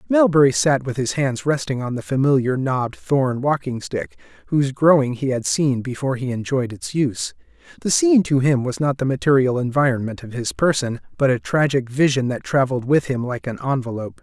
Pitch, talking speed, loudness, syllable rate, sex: 135 Hz, 195 wpm, -20 LUFS, 5.6 syllables/s, male